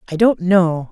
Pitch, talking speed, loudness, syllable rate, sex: 185 Hz, 195 wpm, -15 LUFS, 4.5 syllables/s, female